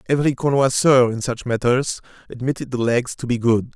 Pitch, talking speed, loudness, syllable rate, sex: 125 Hz, 175 wpm, -19 LUFS, 5.5 syllables/s, male